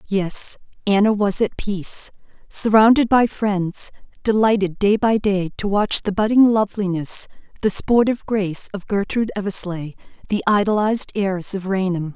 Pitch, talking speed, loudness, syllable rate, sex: 200 Hz, 140 wpm, -19 LUFS, 5.0 syllables/s, female